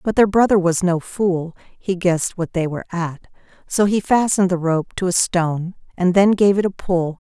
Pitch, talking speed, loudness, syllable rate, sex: 180 Hz, 215 wpm, -18 LUFS, 5.0 syllables/s, female